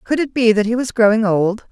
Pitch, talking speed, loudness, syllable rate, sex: 225 Hz, 280 wpm, -16 LUFS, 5.6 syllables/s, female